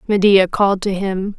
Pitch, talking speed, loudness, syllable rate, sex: 195 Hz, 175 wpm, -16 LUFS, 4.9 syllables/s, female